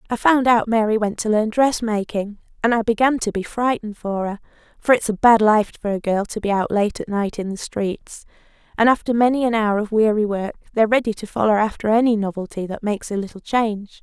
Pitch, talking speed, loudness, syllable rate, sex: 215 Hz, 230 wpm, -20 LUFS, 5.8 syllables/s, female